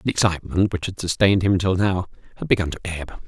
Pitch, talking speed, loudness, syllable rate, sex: 95 Hz, 220 wpm, -21 LUFS, 6.3 syllables/s, male